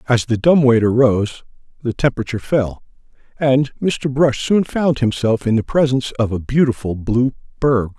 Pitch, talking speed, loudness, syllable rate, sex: 125 Hz, 165 wpm, -17 LUFS, 4.9 syllables/s, male